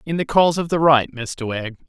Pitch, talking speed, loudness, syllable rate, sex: 145 Hz, 255 wpm, -19 LUFS, 5.6 syllables/s, male